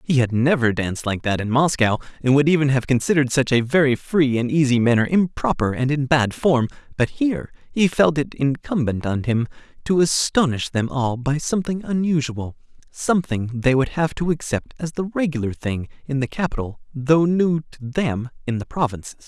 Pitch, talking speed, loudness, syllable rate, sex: 140 Hz, 185 wpm, -21 LUFS, 5.3 syllables/s, male